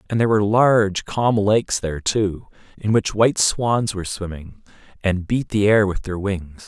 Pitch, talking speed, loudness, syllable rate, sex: 100 Hz, 190 wpm, -20 LUFS, 5.0 syllables/s, male